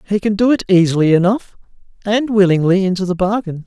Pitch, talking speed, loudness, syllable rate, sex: 195 Hz, 180 wpm, -15 LUFS, 6.2 syllables/s, male